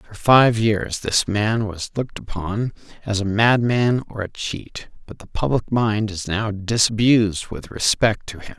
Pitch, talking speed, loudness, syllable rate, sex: 105 Hz, 175 wpm, -20 LUFS, 4.1 syllables/s, male